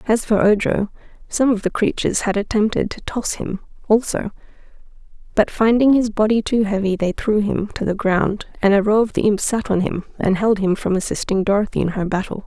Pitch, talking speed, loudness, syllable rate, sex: 205 Hz, 205 wpm, -19 LUFS, 5.5 syllables/s, female